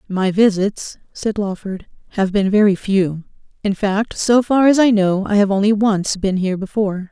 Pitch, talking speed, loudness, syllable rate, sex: 200 Hz, 175 wpm, -17 LUFS, 4.7 syllables/s, female